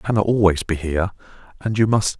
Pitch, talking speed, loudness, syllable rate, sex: 100 Hz, 220 wpm, -20 LUFS, 7.1 syllables/s, male